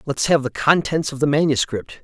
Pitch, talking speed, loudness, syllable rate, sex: 145 Hz, 205 wpm, -19 LUFS, 5.5 syllables/s, male